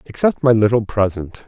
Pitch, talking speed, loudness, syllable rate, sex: 115 Hz, 165 wpm, -17 LUFS, 5.4 syllables/s, male